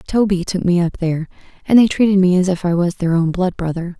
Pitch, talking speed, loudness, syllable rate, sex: 180 Hz, 255 wpm, -16 LUFS, 6.0 syllables/s, female